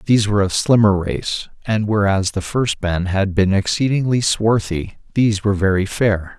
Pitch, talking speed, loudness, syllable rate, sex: 100 Hz, 170 wpm, -18 LUFS, 4.9 syllables/s, male